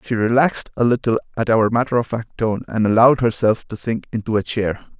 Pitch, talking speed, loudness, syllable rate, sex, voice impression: 115 Hz, 215 wpm, -19 LUFS, 5.8 syllables/s, male, masculine, adult-like, thick, tensed, powerful, clear, mature, friendly, slightly reassuring, wild, slightly lively